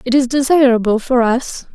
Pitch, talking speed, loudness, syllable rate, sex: 250 Hz, 170 wpm, -14 LUFS, 5.0 syllables/s, female